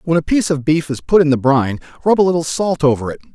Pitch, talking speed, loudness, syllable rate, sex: 155 Hz, 285 wpm, -16 LUFS, 7.1 syllables/s, male